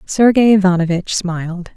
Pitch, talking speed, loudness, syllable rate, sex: 185 Hz, 100 wpm, -14 LUFS, 4.9 syllables/s, female